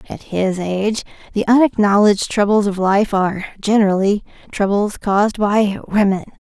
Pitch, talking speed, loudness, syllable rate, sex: 205 Hz, 130 wpm, -17 LUFS, 5.1 syllables/s, female